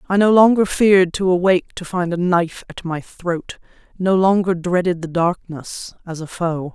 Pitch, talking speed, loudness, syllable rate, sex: 180 Hz, 185 wpm, -18 LUFS, 4.8 syllables/s, female